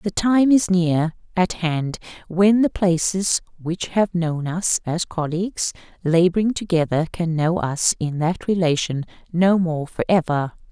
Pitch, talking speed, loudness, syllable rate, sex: 175 Hz, 150 wpm, -20 LUFS, 4.1 syllables/s, female